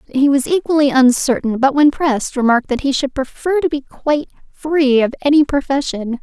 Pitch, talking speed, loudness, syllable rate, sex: 275 Hz, 185 wpm, -15 LUFS, 5.4 syllables/s, female